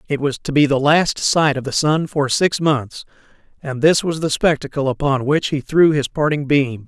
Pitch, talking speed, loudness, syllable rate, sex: 145 Hz, 220 wpm, -17 LUFS, 4.7 syllables/s, male